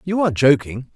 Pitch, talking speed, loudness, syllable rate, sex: 145 Hz, 190 wpm, -17 LUFS, 6.0 syllables/s, male